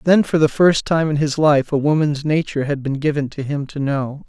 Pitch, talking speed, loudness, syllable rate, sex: 145 Hz, 250 wpm, -18 LUFS, 5.3 syllables/s, male